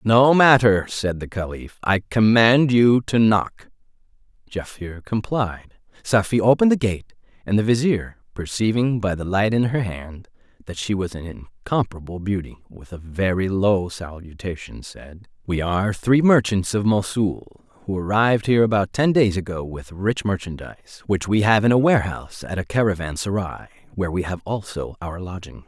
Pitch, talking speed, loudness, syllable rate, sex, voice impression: 100 Hz, 165 wpm, -20 LUFS, 5.1 syllables/s, male, masculine, middle-aged, tensed, powerful, slightly hard, clear, raspy, cool, slightly intellectual, calm, mature, slightly friendly, reassuring, wild, lively, slightly strict, slightly sharp